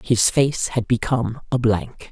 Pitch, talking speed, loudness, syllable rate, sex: 120 Hz, 170 wpm, -20 LUFS, 4.1 syllables/s, female